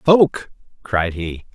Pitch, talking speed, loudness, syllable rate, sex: 115 Hz, 115 wpm, -19 LUFS, 2.8 syllables/s, male